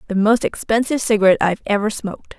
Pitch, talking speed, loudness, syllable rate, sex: 215 Hz, 175 wpm, -18 LUFS, 7.6 syllables/s, female